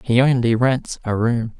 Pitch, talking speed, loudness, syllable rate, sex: 120 Hz, 190 wpm, -19 LUFS, 4.2 syllables/s, male